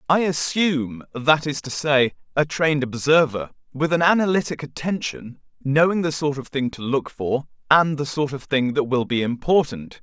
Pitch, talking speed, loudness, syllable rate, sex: 145 Hz, 180 wpm, -21 LUFS, 4.9 syllables/s, male